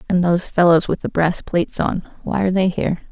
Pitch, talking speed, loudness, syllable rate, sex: 180 Hz, 230 wpm, -18 LUFS, 6.4 syllables/s, female